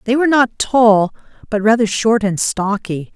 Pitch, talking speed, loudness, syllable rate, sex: 220 Hz, 170 wpm, -15 LUFS, 4.7 syllables/s, female